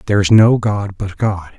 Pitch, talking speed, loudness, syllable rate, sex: 100 Hz, 230 wpm, -15 LUFS, 5.0 syllables/s, male